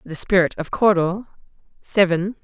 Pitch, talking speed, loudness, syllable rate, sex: 185 Hz, 125 wpm, -19 LUFS, 4.6 syllables/s, female